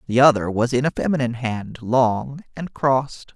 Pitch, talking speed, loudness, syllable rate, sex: 125 Hz, 180 wpm, -20 LUFS, 5.0 syllables/s, male